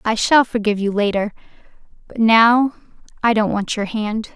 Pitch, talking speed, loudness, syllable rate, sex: 220 Hz, 165 wpm, -17 LUFS, 4.9 syllables/s, female